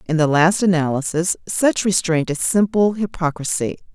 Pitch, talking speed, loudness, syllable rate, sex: 175 Hz, 135 wpm, -18 LUFS, 4.7 syllables/s, female